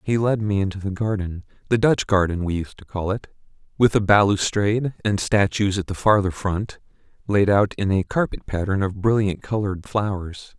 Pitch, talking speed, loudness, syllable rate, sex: 100 Hz, 175 wpm, -21 LUFS, 5.2 syllables/s, male